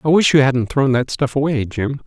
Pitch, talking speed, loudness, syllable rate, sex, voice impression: 135 Hz, 260 wpm, -17 LUFS, 5.2 syllables/s, male, masculine, adult-like, sincere, slightly calm, slightly elegant